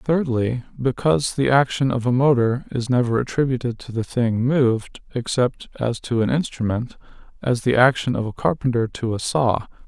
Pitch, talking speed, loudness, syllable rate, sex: 125 Hz, 170 wpm, -21 LUFS, 5.0 syllables/s, male